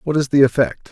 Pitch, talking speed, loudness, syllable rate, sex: 135 Hz, 265 wpm, -16 LUFS, 6.2 syllables/s, male